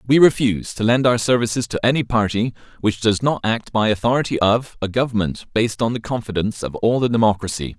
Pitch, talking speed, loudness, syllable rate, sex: 110 Hz, 200 wpm, -19 LUFS, 6.1 syllables/s, male